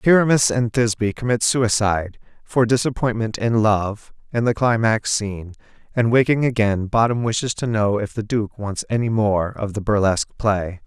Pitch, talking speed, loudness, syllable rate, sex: 110 Hz, 165 wpm, -20 LUFS, 4.9 syllables/s, male